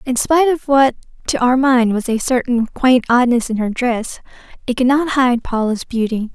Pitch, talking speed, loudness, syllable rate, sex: 250 Hz, 200 wpm, -16 LUFS, 4.8 syllables/s, female